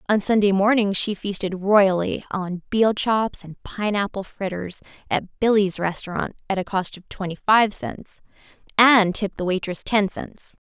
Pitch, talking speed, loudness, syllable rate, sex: 200 Hz, 150 wpm, -21 LUFS, 4.4 syllables/s, female